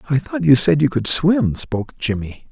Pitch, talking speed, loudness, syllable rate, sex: 140 Hz, 215 wpm, -17 LUFS, 4.9 syllables/s, male